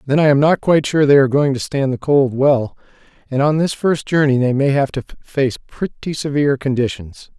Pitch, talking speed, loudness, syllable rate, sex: 140 Hz, 220 wpm, -16 LUFS, 5.6 syllables/s, male